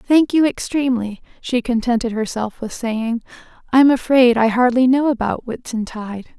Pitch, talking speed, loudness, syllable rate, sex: 240 Hz, 140 wpm, -18 LUFS, 4.9 syllables/s, female